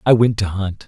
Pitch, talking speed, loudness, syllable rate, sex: 105 Hz, 275 wpm, -18 LUFS, 5.3 syllables/s, male